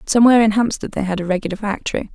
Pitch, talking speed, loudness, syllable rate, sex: 210 Hz, 225 wpm, -18 LUFS, 8.0 syllables/s, female